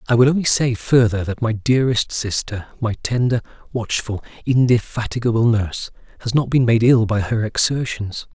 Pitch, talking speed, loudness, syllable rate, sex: 115 Hz, 155 wpm, -19 LUFS, 5.2 syllables/s, male